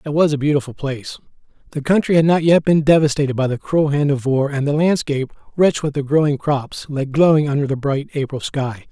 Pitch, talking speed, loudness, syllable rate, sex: 145 Hz, 220 wpm, -18 LUFS, 5.8 syllables/s, male